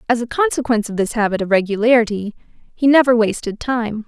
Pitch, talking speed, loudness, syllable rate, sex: 230 Hz, 175 wpm, -17 LUFS, 6.3 syllables/s, female